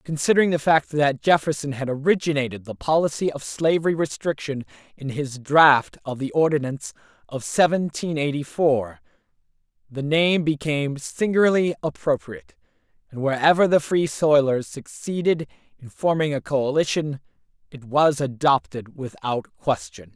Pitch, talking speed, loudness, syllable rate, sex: 145 Hz, 125 wpm, -22 LUFS, 4.9 syllables/s, male